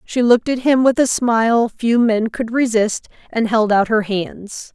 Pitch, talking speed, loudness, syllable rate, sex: 230 Hz, 200 wpm, -16 LUFS, 4.3 syllables/s, female